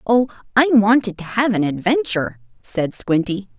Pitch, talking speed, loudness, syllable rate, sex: 210 Hz, 150 wpm, -18 LUFS, 5.0 syllables/s, female